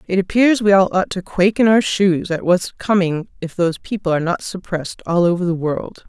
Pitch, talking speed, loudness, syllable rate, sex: 185 Hz, 225 wpm, -17 LUFS, 5.5 syllables/s, female